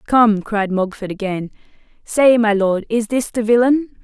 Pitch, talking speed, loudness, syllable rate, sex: 220 Hz, 165 wpm, -17 LUFS, 4.2 syllables/s, female